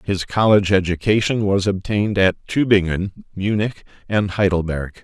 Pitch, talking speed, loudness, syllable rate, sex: 100 Hz, 120 wpm, -19 LUFS, 5.1 syllables/s, male